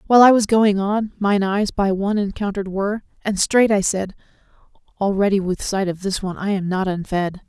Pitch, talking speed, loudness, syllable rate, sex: 200 Hz, 200 wpm, -19 LUFS, 5.6 syllables/s, female